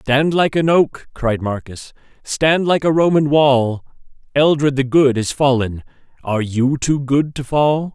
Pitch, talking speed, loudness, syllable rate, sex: 140 Hz, 165 wpm, -16 LUFS, 4.1 syllables/s, male